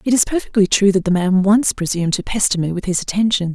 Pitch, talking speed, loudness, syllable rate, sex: 195 Hz, 255 wpm, -17 LUFS, 6.4 syllables/s, female